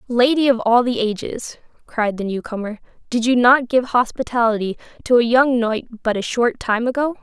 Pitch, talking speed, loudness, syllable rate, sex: 240 Hz, 190 wpm, -18 LUFS, 5.2 syllables/s, female